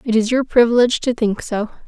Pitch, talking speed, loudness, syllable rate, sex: 230 Hz, 225 wpm, -17 LUFS, 6.1 syllables/s, female